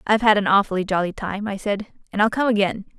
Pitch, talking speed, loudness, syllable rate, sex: 205 Hz, 240 wpm, -21 LUFS, 6.6 syllables/s, female